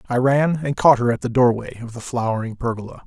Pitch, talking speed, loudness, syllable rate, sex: 125 Hz, 235 wpm, -19 LUFS, 6.3 syllables/s, male